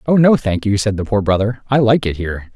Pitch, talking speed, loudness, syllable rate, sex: 110 Hz, 280 wpm, -16 LUFS, 6.0 syllables/s, male